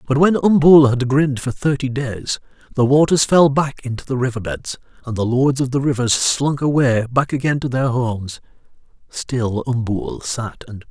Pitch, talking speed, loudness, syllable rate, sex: 130 Hz, 185 wpm, -17 LUFS, 5.0 syllables/s, male